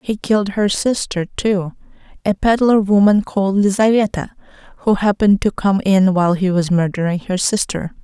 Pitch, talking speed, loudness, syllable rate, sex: 195 Hz, 155 wpm, -16 LUFS, 5.1 syllables/s, female